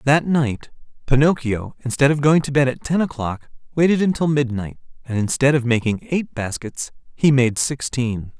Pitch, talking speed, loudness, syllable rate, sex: 135 Hz, 165 wpm, -20 LUFS, 4.8 syllables/s, male